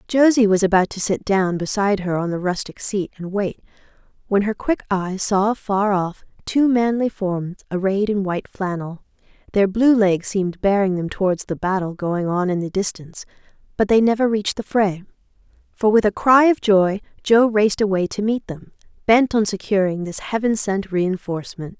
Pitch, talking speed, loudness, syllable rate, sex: 200 Hz, 185 wpm, -19 LUFS, 5.1 syllables/s, female